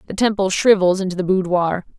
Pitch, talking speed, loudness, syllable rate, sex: 190 Hz, 180 wpm, -18 LUFS, 5.9 syllables/s, female